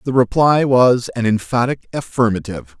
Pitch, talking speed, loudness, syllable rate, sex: 120 Hz, 130 wpm, -16 LUFS, 4.9 syllables/s, male